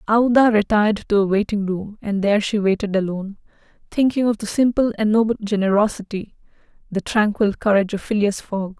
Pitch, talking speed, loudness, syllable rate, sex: 210 Hz, 165 wpm, -19 LUFS, 6.0 syllables/s, female